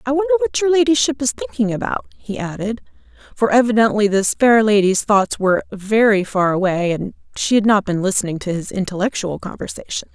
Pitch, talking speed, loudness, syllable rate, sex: 215 Hz, 175 wpm, -17 LUFS, 5.7 syllables/s, female